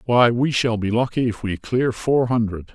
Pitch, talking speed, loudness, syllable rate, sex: 115 Hz, 220 wpm, -20 LUFS, 4.6 syllables/s, male